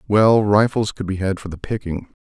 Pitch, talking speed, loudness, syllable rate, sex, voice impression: 100 Hz, 215 wpm, -19 LUFS, 5.1 syllables/s, male, very masculine, slightly old, thick, calm, wild